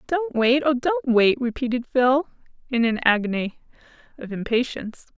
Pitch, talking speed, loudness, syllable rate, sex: 250 Hz, 140 wpm, -22 LUFS, 4.8 syllables/s, female